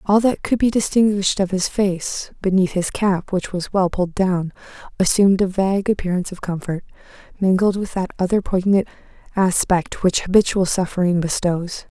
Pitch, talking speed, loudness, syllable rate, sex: 190 Hz, 160 wpm, -19 LUFS, 5.2 syllables/s, female